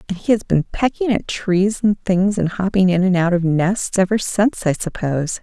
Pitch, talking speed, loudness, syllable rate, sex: 190 Hz, 220 wpm, -18 LUFS, 5.0 syllables/s, female